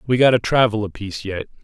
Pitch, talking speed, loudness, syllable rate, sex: 110 Hz, 220 wpm, -19 LUFS, 6.8 syllables/s, male